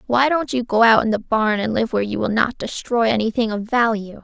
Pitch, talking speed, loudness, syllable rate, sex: 230 Hz, 255 wpm, -19 LUFS, 5.7 syllables/s, female